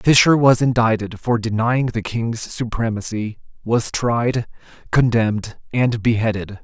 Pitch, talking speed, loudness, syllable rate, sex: 115 Hz, 120 wpm, -19 LUFS, 4.2 syllables/s, male